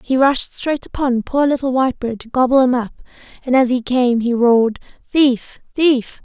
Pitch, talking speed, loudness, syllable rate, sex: 255 Hz, 185 wpm, -16 LUFS, 4.8 syllables/s, female